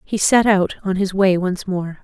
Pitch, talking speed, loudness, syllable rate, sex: 190 Hz, 235 wpm, -18 LUFS, 4.4 syllables/s, female